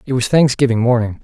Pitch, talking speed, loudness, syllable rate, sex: 125 Hz, 195 wpm, -15 LUFS, 6.3 syllables/s, male